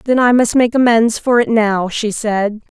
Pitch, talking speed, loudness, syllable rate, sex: 230 Hz, 215 wpm, -14 LUFS, 4.4 syllables/s, female